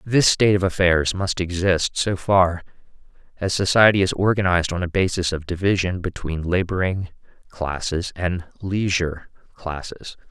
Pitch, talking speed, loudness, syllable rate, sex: 90 Hz, 135 wpm, -21 LUFS, 4.7 syllables/s, male